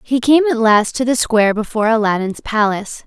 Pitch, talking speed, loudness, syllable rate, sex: 225 Hz, 195 wpm, -15 LUFS, 5.9 syllables/s, female